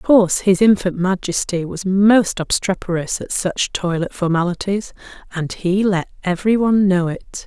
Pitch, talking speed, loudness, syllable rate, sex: 190 Hz, 145 wpm, -18 LUFS, 4.6 syllables/s, female